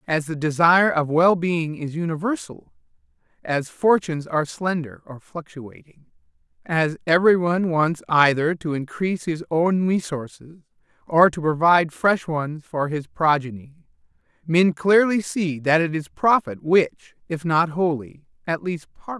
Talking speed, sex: 145 wpm, male